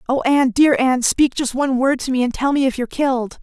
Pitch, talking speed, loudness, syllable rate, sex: 260 Hz, 280 wpm, -17 LUFS, 6.5 syllables/s, female